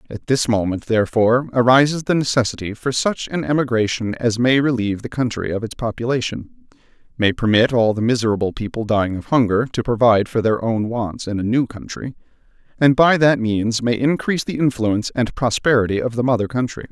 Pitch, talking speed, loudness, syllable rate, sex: 120 Hz, 185 wpm, -18 LUFS, 5.8 syllables/s, male